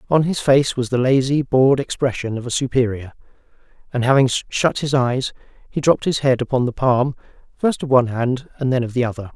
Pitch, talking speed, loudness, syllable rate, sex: 130 Hz, 205 wpm, -19 LUFS, 5.8 syllables/s, male